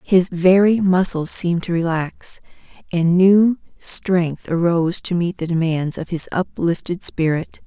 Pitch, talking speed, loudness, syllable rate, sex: 175 Hz, 140 wpm, -18 LUFS, 4.1 syllables/s, female